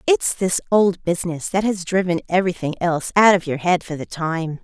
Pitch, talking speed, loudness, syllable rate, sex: 180 Hz, 205 wpm, -19 LUFS, 5.5 syllables/s, female